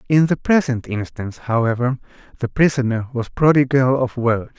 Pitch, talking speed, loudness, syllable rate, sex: 125 Hz, 145 wpm, -19 LUFS, 5.1 syllables/s, male